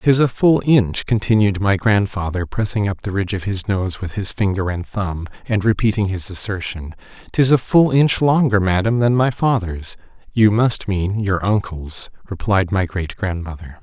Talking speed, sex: 170 wpm, male